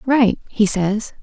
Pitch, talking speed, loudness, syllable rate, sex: 220 Hz, 145 wpm, -18 LUFS, 3.2 syllables/s, female